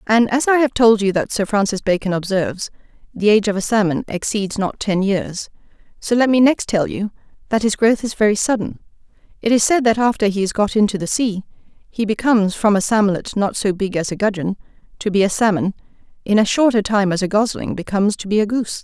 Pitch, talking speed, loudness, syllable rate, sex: 210 Hz, 225 wpm, -18 LUFS, 5.8 syllables/s, female